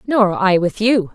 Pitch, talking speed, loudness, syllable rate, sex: 205 Hz, 210 wpm, -16 LUFS, 4.0 syllables/s, female